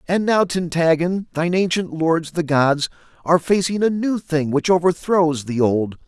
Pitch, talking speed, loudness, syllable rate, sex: 170 Hz, 170 wpm, -19 LUFS, 4.6 syllables/s, male